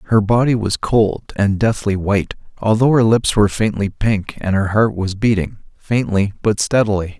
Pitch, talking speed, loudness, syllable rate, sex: 105 Hz, 175 wpm, -17 LUFS, 4.8 syllables/s, male